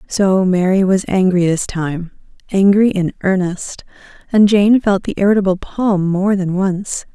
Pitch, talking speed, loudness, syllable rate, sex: 190 Hz, 150 wpm, -15 LUFS, 4.2 syllables/s, female